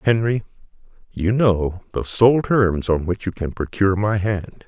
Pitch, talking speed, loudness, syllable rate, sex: 100 Hz, 165 wpm, -20 LUFS, 4.3 syllables/s, male